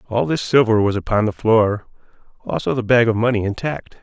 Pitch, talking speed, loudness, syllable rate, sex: 115 Hz, 195 wpm, -18 LUFS, 5.6 syllables/s, male